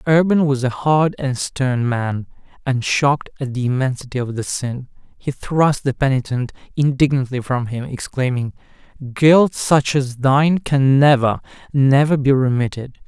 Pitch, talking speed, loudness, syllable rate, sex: 135 Hz, 145 wpm, -18 LUFS, 4.5 syllables/s, male